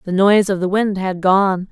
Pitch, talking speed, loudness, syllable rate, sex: 190 Hz, 245 wpm, -16 LUFS, 5.0 syllables/s, female